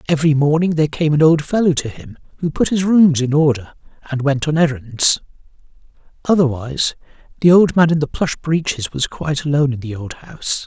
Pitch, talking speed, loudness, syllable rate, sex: 150 Hz, 190 wpm, -16 LUFS, 5.8 syllables/s, male